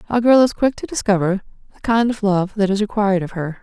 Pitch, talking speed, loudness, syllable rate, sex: 205 Hz, 250 wpm, -18 LUFS, 6.1 syllables/s, female